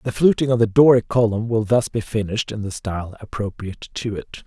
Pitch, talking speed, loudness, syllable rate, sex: 110 Hz, 215 wpm, -20 LUFS, 6.2 syllables/s, male